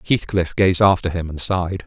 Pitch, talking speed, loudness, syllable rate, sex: 90 Hz, 195 wpm, -19 LUFS, 5.5 syllables/s, male